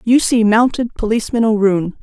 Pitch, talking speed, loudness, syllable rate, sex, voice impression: 220 Hz, 150 wpm, -15 LUFS, 5.5 syllables/s, female, feminine, adult-like, slightly relaxed, slightly dark, soft, slightly muffled, intellectual, calm, reassuring, slightly elegant, kind, slightly modest